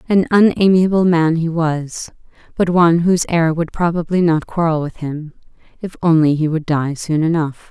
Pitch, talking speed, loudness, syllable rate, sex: 165 Hz, 165 wpm, -16 LUFS, 4.9 syllables/s, female